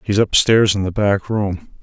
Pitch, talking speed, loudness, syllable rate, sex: 100 Hz, 195 wpm, -16 LUFS, 4.3 syllables/s, male